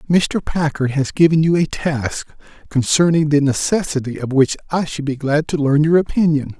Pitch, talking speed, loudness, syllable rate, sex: 150 Hz, 180 wpm, -17 LUFS, 4.9 syllables/s, male